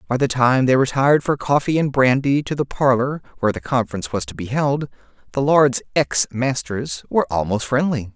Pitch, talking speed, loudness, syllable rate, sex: 130 Hz, 190 wpm, -19 LUFS, 5.5 syllables/s, male